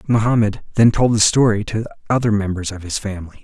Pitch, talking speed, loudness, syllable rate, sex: 105 Hz, 190 wpm, -18 LUFS, 6.2 syllables/s, male